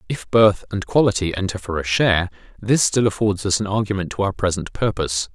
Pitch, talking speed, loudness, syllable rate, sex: 100 Hz, 200 wpm, -20 LUFS, 5.8 syllables/s, male